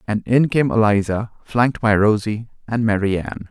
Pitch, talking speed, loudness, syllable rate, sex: 110 Hz, 170 wpm, -18 LUFS, 5.2 syllables/s, male